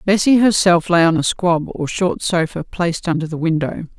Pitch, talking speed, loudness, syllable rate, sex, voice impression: 170 Hz, 195 wpm, -17 LUFS, 5.2 syllables/s, female, feminine, slightly gender-neutral, very adult-like, very middle-aged, slightly thin, slightly tensed, powerful, dark, very hard, slightly clear, fluent, slightly raspy, cool, intellectual, slightly refreshing, very sincere, very calm, slightly mature, slightly friendly, reassuring, very unique, elegant, very wild, slightly sweet, lively, strict, slightly intense, sharp